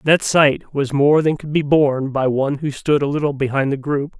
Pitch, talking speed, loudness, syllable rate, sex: 145 Hz, 245 wpm, -18 LUFS, 5.1 syllables/s, male